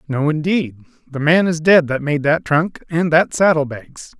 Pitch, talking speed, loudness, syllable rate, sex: 155 Hz, 200 wpm, -16 LUFS, 4.5 syllables/s, male